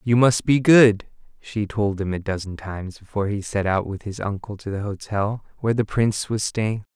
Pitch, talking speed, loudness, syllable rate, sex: 105 Hz, 215 wpm, -22 LUFS, 5.3 syllables/s, male